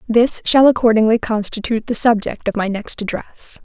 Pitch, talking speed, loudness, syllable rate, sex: 225 Hz, 165 wpm, -16 LUFS, 5.3 syllables/s, female